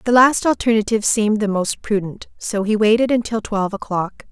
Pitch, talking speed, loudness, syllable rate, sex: 215 Hz, 180 wpm, -18 LUFS, 5.6 syllables/s, female